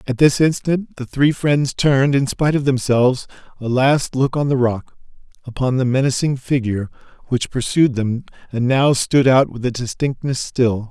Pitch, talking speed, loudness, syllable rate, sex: 130 Hz, 175 wpm, -18 LUFS, 4.9 syllables/s, male